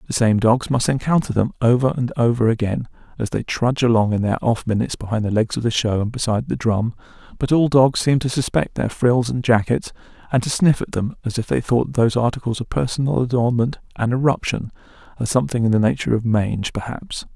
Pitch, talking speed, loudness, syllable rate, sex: 120 Hz, 210 wpm, -20 LUFS, 6.0 syllables/s, male